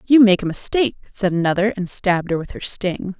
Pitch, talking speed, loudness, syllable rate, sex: 195 Hz, 225 wpm, -19 LUFS, 6.0 syllables/s, female